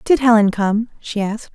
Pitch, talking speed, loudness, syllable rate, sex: 220 Hz, 195 wpm, -17 LUFS, 5.2 syllables/s, female